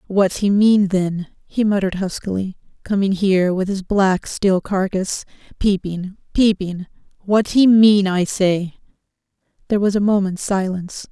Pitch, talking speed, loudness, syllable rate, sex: 195 Hz, 130 wpm, -18 LUFS, 4.6 syllables/s, female